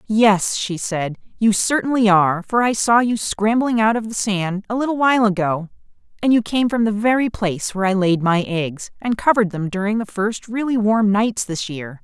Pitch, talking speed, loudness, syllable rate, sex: 210 Hz, 210 wpm, -19 LUFS, 5.1 syllables/s, female